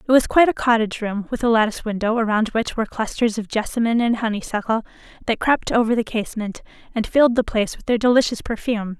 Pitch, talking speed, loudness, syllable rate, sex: 225 Hz, 205 wpm, -20 LUFS, 6.8 syllables/s, female